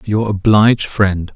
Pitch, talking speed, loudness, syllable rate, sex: 105 Hz, 135 wpm, -14 LUFS, 4.0 syllables/s, male